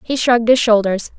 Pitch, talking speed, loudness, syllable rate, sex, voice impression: 230 Hz, 200 wpm, -14 LUFS, 5.7 syllables/s, female, feminine, adult-like, tensed, bright, clear, intellectual, calm, friendly, elegant, slightly sharp, modest